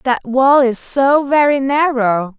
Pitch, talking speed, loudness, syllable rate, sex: 260 Hz, 150 wpm, -14 LUFS, 3.5 syllables/s, female